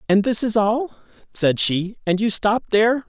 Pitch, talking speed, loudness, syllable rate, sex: 215 Hz, 195 wpm, -19 LUFS, 4.9 syllables/s, male